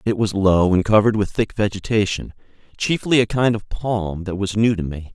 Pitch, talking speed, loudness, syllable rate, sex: 105 Hz, 200 wpm, -19 LUFS, 5.2 syllables/s, male